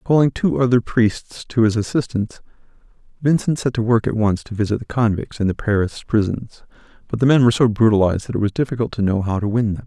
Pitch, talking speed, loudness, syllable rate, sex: 115 Hz, 225 wpm, -19 LUFS, 6.2 syllables/s, male